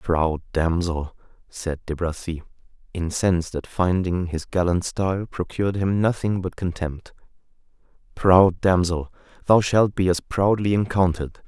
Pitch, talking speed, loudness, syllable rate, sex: 90 Hz, 120 wpm, -22 LUFS, 4.4 syllables/s, male